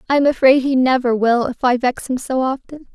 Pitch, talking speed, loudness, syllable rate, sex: 260 Hz, 245 wpm, -16 LUFS, 5.5 syllables/s, female